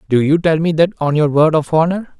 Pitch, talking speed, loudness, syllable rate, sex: 160 Hz, 275 wpm, -14 LUFS, 5.5 syllables/s, male